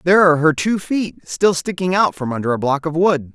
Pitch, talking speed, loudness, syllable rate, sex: 165 Hz, 250 wpm, -17 LUFS, 5.6 syllables/s, male